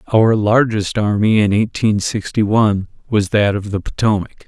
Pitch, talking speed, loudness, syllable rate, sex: 105 Hz, 160 wpm, -16 LUFS, 4.9 syllables/s, male